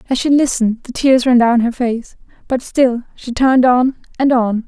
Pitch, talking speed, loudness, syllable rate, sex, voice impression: 245 Hz, 205 wpm, -15 LUFS, 4.9 syllables/s, female, feminine, slightly adult-like, soft, calm, friendly, slightly sweet, slightly kind